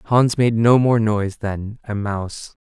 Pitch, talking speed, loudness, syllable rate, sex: 110 Hz, 185 wpm, -19 LUFS, 4.0 syllables/s, male